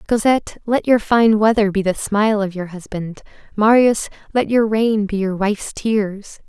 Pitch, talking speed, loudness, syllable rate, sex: 210 Hz, 175 wpm, -17 LUFS, 4.6 syllables/s, female